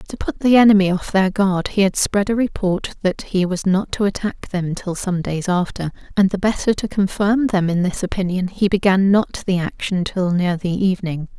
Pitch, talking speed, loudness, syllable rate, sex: 190 Hz, 215 wpm, -19 LUFS, 5.0 syllables/s, female